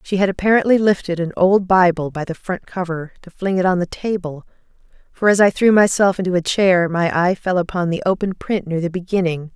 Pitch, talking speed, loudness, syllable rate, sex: 180 Hz, 220 wpm, -18 LUFS, 5.5 syllables/s, female